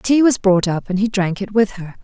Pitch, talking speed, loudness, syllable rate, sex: 205 Hz, 295 wpm, -17 LUFS, 5.1 syllables/s, female